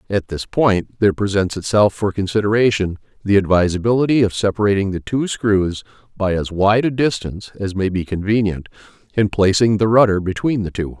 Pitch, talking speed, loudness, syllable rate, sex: 100 Hz, 170 wpm, -18 LUFS, 5.5 syllables/s, male